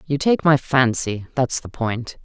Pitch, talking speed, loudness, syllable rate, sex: 130 Hz, 190 wpm, -20 LUFS, 4.0 syllables/s, female